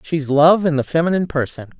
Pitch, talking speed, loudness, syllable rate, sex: 155 Hz, 200 wpm, -17 LUFS, 6.1 syllables/s, female